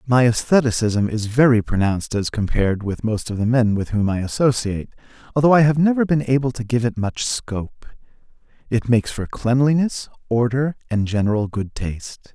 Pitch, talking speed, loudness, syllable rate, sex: 115 Hz, 175 wpm, -20 LUFS, 5.5 syllables/s, male